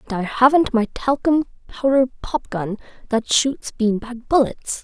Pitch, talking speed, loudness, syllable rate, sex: 245 Hz, 160 wpm, -20 LUFS, 4.3 syllables/s, female